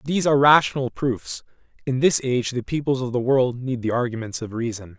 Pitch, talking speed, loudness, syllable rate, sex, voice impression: 125 Hz, 205 wpm, -22 LUFS, 5.8 syllables/s, male, masculine, adult-like, clear, refreshing, friendly, reassuring, elegant